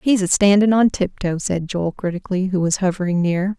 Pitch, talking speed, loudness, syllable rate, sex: 185 Hz, 215 wpm, -19 LUFS, 5.4 syllables/s, female